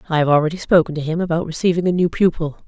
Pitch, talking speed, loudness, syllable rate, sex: 165 Hz, 245 wpm, -18 LUFS, 7.4 syllables/s, female